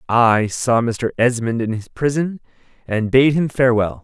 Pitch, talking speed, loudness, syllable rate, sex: 120 Hz, 165 wpm, -18 LUFS, 4.5 syllables/s, male